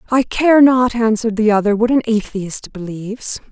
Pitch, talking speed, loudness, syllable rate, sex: 225 Hz, 170 wpm, -15 LUFS, 5.0 syllables/s, female